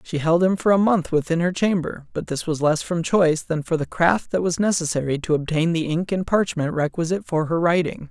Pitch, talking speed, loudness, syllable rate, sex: 170 Hz, 235 wpm, -21 LUFS, 5.5 syllables/s, male